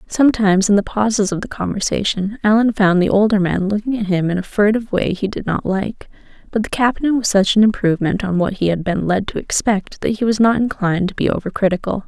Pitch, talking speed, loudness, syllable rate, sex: 205 Hz, 235 wpm, -17 LUFS, 6.0 syllables/s, female